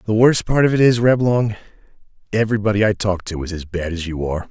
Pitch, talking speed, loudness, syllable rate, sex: 105 Hz, 225 wpm, -18 LUFS, 6.4 syllables/s, male